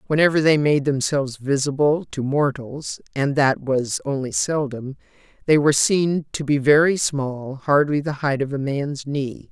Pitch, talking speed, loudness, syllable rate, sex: 140 Hz, 150 wpm, -20 LUFS, 4.4 syllables/s, female